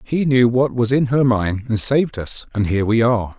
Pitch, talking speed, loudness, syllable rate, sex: 120 Hz, 250 wpm, -18 LUFS, 5.4 syllables/s, male